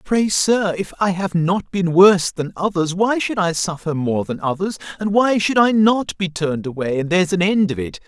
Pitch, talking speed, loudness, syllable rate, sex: 180 Hz, 230 wpm, -18 LUFS, 5.0 syllables/s, male